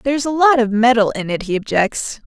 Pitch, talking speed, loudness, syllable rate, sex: 235 Hz, 235 wpm, -16 LUFS, 5.6 syllables/s, female